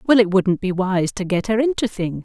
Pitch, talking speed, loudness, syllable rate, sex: 200 Hz, 270 wpm, -19 LUFS, 5.3 syllables/s, female